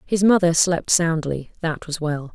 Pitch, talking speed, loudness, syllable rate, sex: 165 Hz, 180 wpm, -20 LUFS, 4.3 syllables/s, female